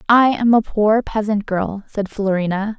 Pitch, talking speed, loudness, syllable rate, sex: 210 Hz, 170 wpm, -18 LUFS, 4.3 syllables/s, female